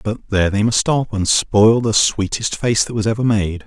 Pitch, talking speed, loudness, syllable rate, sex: 110 Hz, 230 wpm, -16 LUFS, 4.9 syllables/s, male